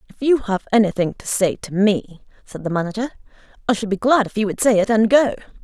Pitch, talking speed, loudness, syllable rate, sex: 210 Hz, 235 wpm, -19 LUFS, 6.1 syllables/s, female